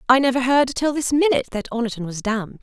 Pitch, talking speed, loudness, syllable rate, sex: 250 Hz, 230 wpm, -20 LUFS, 6.4 syllables/s, female